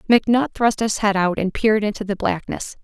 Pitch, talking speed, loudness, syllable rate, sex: 210 Hz, 210 wpm, -20 LUFS, 5.9 syllables/s, female